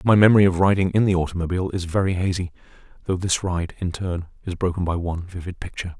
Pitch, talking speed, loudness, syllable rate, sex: 90 Hz, 210 wpm, -22 LUFS, 6.8 syllables/s, male